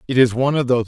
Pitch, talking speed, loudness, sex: 125 Hz, 345 wpm, -17 LUFS, male